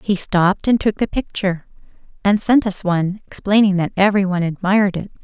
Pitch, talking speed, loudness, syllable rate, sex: 195 Hz, 185 wpm, -17 LUFS, 6.1 syllables/s, female